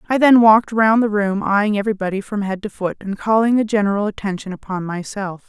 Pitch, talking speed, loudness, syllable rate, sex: 205 Hz, 210 wpm, -18 LUFS, 6.0 syllables/s, female